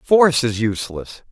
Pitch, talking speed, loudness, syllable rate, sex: 130 Hz, 135 wpm, -18 LUFS, 5.0 syllables/s, male